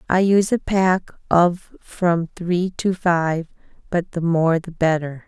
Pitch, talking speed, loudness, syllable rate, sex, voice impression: 175 Hz, 160 wpm, -20 LUFS, 3.7 syllables/s, female, feminine, adult-like, relaxed, dark, slightly muffled, calm, slightly kind, modest